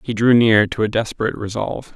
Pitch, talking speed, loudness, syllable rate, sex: 110 Hz, 215 wpm, -18 LUFS, 6.5 syllables/s, male